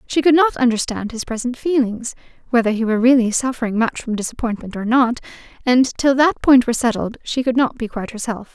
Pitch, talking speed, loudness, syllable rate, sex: 240 Hz, 205 wpm, -18 LUFS, 6.1 syllables/s, female